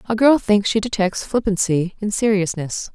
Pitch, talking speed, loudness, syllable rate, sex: 205 Hz, 165 wpm, -19 LUFS, 4.7 syllables/s, female